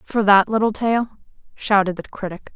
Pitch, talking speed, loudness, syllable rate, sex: 210 Hz, 165 wpm, -19 LUFS, 4.8 syllables/s, female